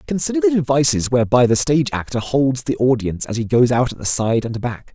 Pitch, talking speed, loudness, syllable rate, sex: 130 Hz, 230 wpm, -18 LUFS, 6.1 syllables/s, male